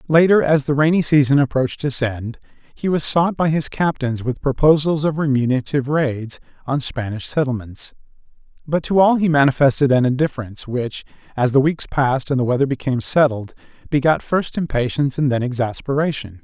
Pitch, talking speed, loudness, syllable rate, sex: 135 Hz, 165 wpm, -18 LUFS, 5.7 syllables/s, male